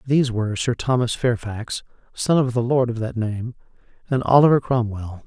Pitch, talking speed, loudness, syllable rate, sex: 120 Hz, 170 wpm, -21 LUFS, 5.1 syllables/s, male